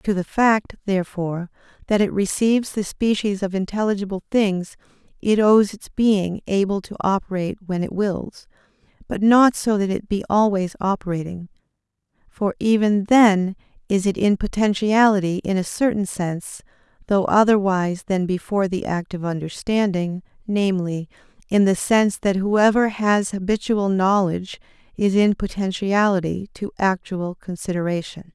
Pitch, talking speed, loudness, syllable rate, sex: 195 Hz, 135 wpm, -20 LUFS, 4.8 syllables/s, female